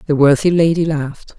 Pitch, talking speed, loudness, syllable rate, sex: 155 Hz, 175 wpm, -14 LUFS, 5.7 syllables/s, female